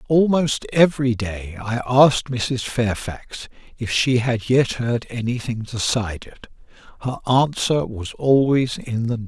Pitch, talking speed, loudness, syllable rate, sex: 120 Hz, 135 wpm, -20 LUFS, 4.3 syllables/s, male